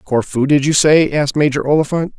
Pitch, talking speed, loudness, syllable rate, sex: 145 Hz, 190 wpm, -14 LUFS, 5.8 syllables/s, male